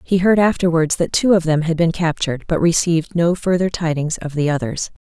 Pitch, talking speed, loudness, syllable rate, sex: 165 Hz, 215 wpm, -17 LUFS, 5.6 syllables/s, female